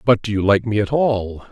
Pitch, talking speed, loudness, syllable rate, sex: 110 Hz, 275 wpm, -18 LUFS, 5.0 syllables/s, male